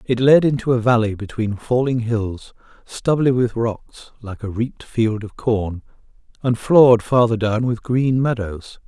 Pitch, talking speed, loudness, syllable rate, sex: 115 Hz, 160 wpm, -18 LUFS, 4.3 syllables/s, male